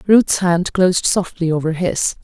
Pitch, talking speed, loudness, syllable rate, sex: 175 Hz, 160 wpm, -16 LUFS, 4.4 syllables/s, female